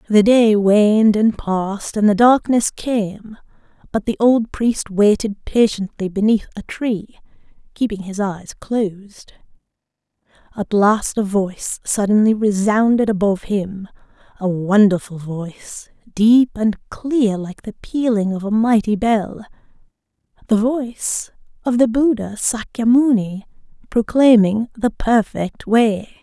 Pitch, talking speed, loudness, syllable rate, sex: 215 Hz, 115 wpm, -17 LUFS, 3.9 syllables/s, female